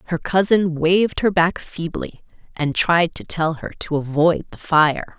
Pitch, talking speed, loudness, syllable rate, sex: 170 Hz, 175 wpm, -19 LUFS, 4.2 syllables/s, female